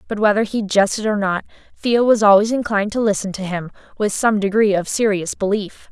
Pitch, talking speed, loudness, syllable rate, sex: 205 Hz, 205 wpm, -18 LUFS, 5.6 syllables/s, female